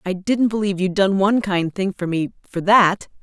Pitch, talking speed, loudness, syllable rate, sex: 195 Hz, 205 wpm, -19 LUFS, 5.2 syllables/s, female